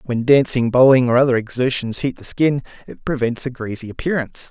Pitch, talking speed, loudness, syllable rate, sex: 125 Hz, 185 wpm, -18 LUFS, 5.7 syllables/s, male